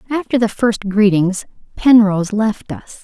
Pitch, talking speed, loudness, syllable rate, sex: 215 Hz, 140 wpm, -15 LUFS, 4.4 syllables/s, female